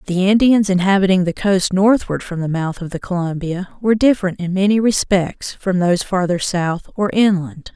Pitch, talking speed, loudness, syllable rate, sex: 185 Hz, 180 wpm, -17 LUFS, 5.1 syllables/s, female